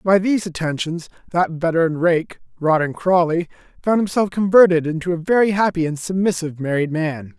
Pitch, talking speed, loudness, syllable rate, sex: 170 Hz, 155 wpm, -19 LUFS, 5.5 syllables/s, male